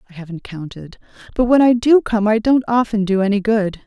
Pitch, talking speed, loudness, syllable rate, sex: 215 Hz, 215 wpm, -16 LUFS, 5.6 syllables/s, female